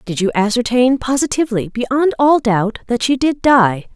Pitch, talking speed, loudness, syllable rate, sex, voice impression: 240 Hz, 165 wpm, -15 LUFS, 4.7 syllables/s, female, feminine, adult-like, tensed, powerful, hard, clear, fluent, intellectual, lively, strict, intense, sharp